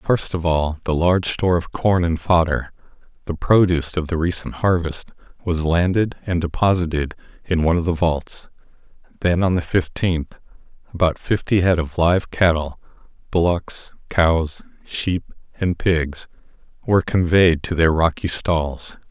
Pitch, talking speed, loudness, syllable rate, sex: 85 Hz, 140 wpm, -20 LUFS, 4.5 syllables/s, male